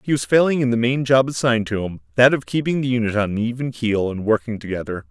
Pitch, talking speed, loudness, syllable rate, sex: 115 Hz, 260 wpm, -20 LUFS, 6.5 syllables/s, male